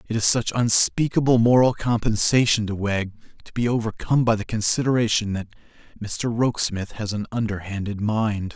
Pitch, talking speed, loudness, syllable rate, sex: 110 Hz, 145 wpm, -21 LUFS, 5.3 syllables/s, male